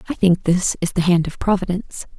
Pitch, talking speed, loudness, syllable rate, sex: 185 Hz, 220 wpm, -19 LUFS, 6.0 syllables/s, female